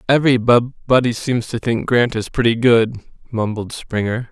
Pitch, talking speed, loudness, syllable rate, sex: 115 Hz, 165 wpm, -17 LUFS, 4.9 syllables/s, male